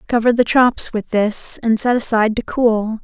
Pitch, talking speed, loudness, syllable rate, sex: 225 Hz, 200 wpm, -16 LUFS, 4.6 syllables/s, female